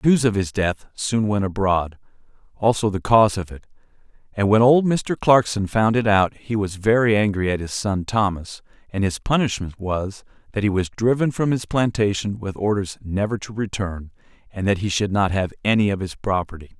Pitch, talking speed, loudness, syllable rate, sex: 105 Hz, 195 wpm, -21 LUFS, 5.1 syllables/s, male